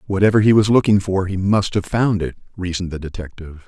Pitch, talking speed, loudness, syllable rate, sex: 95 Hz, 210 wpm, -18 LUFS, 6.4 syllables/s, male